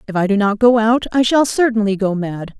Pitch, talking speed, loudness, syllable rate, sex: 220 Hz, 255 wpm, -15 LUFS, 5.6 syllables/s, female